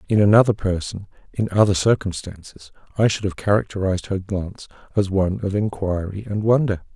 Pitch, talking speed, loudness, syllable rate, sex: 100 Hz, 155 wpm, -21 LUFS, 5.8 syllables/s, male